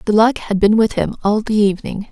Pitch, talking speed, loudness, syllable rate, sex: 210 Hz, 255 wpm, -16 LUFS, 5.8 syllables/s, female